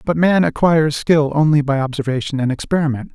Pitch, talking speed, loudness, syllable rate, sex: 150 Hz, 170 wpm, -16 LUFS, 6.0 syllables/s, male